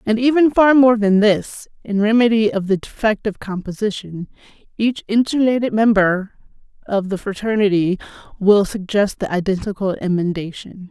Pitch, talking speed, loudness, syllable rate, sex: 210 Hz, 125 wpm, -17 LUFS, 5.0 syllables/s, female